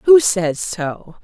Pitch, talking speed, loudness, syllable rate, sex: 200 Hz, 145 wpm, -17 LUFS, 2.9 syllables/s, female